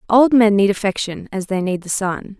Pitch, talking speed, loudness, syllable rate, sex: 205 Hz, 225 wpm, -17 LUFS, 5.1 syllables/s, female